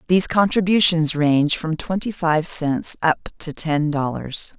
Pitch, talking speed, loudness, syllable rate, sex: 165 Hz, 145 wpm, -19 LUFS, 4.3 syllables/s, female